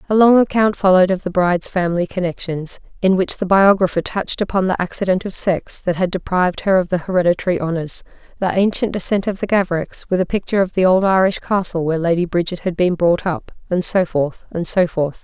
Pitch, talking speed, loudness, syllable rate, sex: 180 Hz, 210 wpm, -17 LUFS, 6.0 syllables/s, female